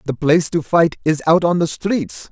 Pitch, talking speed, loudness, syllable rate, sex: 155 Hz, 235 wpm, -17 LUFS, 4.9 syllables/s, male